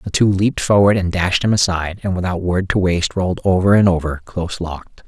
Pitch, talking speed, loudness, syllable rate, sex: 90 Hz, 225 wpm, -17 LUFS, 6.2 syllables/s, male